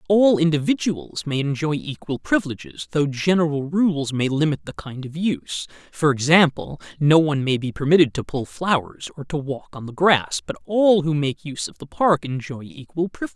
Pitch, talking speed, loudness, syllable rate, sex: 150 Hz, 190 wpm, -21 LUFS, 5.3 syllables/s, male